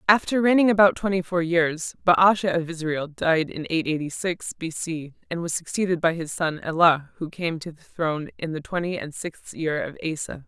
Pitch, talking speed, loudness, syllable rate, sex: 170 Hz, 205 wpm, -24 LUFS, 5.1 syllables/s, female